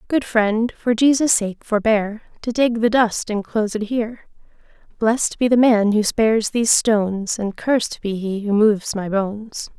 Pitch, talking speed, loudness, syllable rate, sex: 220 Hz, 170 wpm, -19 LUFS, 4.5 syllables/s, female